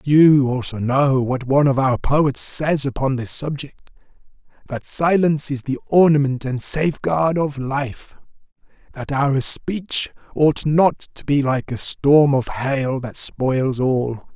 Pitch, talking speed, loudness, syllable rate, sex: 140 Hz, 155 wpm, -19 LUFS, 3.6 syllables/s, male